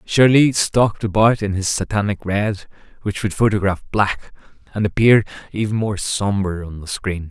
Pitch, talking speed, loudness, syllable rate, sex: 100 Hz, 155 wpm, -18 LUFS, 4.9 syllables/s, male